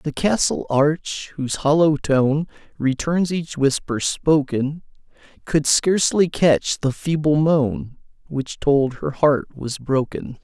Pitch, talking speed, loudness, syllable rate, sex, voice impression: 145 Hz, 125 wpm, -20 LUFS, 3.5 syllables/s, male, masculine, adult-like, slightly middle-aged, tensed, slightly powerful, slightly soft, clear, fluent, slightly cool, intellectual, slightly refreshing, sincere, slightly calm, slightly friendly, slightly elegant, wild, very lively, slightly strict, slightly intense